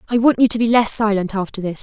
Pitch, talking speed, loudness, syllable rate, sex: 215 Hz, 295 wpm, -16 LUFS, 6.7 syllables/s, female